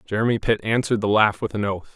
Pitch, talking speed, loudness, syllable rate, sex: 105 Hz, 245 wpm, -21 LUFS, 6.6 syllables/s, male